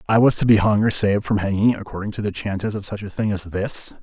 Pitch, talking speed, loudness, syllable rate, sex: 105 Hz, 285 wpm, -20 LUFS, 6.3 syllables/s, male